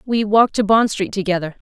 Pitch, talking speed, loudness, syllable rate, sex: 205 Hz, 215 wpm, -17 LUFS, 6.0 syllables/s, female